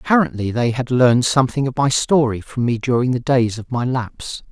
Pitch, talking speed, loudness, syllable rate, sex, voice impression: 125 Hz, 215 wpm, -18 LUFS, 5.7 syllables/s, male, masculine, middle-aged, slightly thick, tensed, slightly powerful, slightly dark, hard, clear, fluent, cool, very intellectual, refreshing, sincere, calm, friendly, reassuring, unique, elegant, slightly wild, slightly sweet, slightly lively, strict, slightly intense